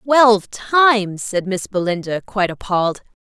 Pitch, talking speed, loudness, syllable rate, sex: 205 Hz, 130 wpm, -17 LUFS, 4.8 syllables/s, female